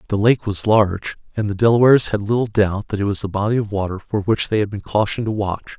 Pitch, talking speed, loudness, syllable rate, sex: 105 Hz, 260 wpm, -19 LUFS, 6.3 syllables/s, male